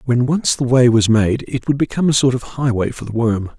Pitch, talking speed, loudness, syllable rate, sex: 125 Hz, 270 wpm, -16 LUFS, 5.6 syllables/s, male